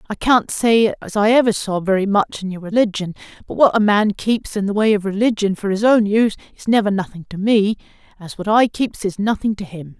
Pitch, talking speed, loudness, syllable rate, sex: 205 Hz, 230 wpm, -18 LUFS, 5.6 syllables/s, female